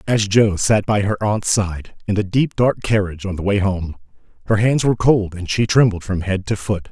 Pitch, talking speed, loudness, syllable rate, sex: 100 Hz, 235 wpm, -18 LUFS, 5.1 syllables/s, male